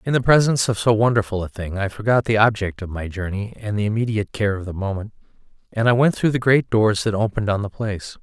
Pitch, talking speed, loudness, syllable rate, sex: 105 Hz, 250 wpm, -20 LUFS, 6.4 syllables/s, male